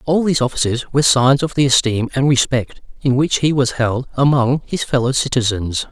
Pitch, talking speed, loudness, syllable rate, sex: 130 Hz, 195 wpm, -16 LUFS, 5.3 syllables/s, male